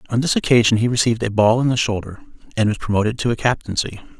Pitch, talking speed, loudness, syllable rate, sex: 115 Hz, 230 wpm, -18 LUFS, 7.1 syllables/s, male